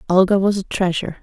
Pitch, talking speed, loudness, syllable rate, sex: 185 Hz, 195 wpm, -18 LUFS, 7.0 syllables/s, female